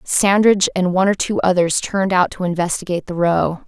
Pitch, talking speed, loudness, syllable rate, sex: 185 Hz, 195 wpm, -17 LUFS, 6.0 syllables/s, female